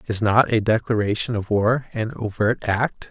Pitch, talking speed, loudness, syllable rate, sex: 110 Hz, 175 wpm, -21 LUFS, 4.6 syllables/s, male